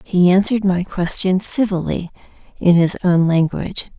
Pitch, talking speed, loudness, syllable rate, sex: 185 Hz, 135 wpm, -17 LUFS, 4.9 syllables/s, female